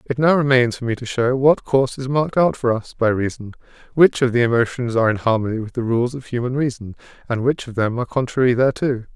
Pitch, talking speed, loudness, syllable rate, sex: 125 Hz, 235 wpm, -19 LUFS, 6.4 syllables/s, male